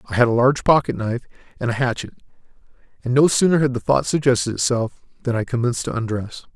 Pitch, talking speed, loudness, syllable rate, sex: 125 Hz, 200 wpm, -20 LUFS, 6.8 syllables/s, male